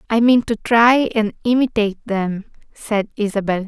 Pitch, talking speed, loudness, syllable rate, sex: 220 Hz, 145 wpm, -17 LUFS, 4.9 syllables/s, female